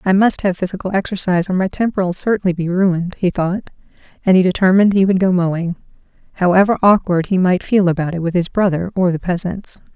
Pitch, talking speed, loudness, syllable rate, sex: 185 Hz, 200 wpm, -16 LUFS, 6.2 syllables/s, female